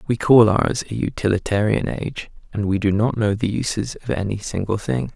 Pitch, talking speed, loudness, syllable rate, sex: 105 Hz, 200 wpm, -20 LUFS, 5.3 syllables/s, male